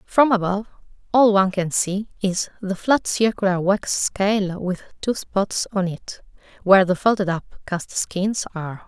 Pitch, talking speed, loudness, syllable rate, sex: 195 Hz, 160 wpm, -21 LUFS, 4.5 syllables/s, female